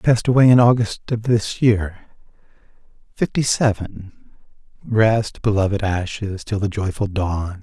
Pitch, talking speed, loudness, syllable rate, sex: 105 Hz, 125 wpm, -19 LUFS, 4.2 syllables/s, male